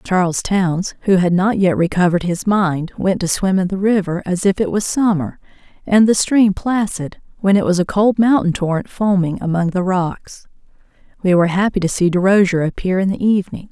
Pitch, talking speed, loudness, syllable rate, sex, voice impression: 190 Hz, 195 wpm, -16 LUFS, 5.3 syllables/s, female, feminine, adult-like, tensed, hard, clear, fluent, intellectual, calm, elegant, lively, slightly sharp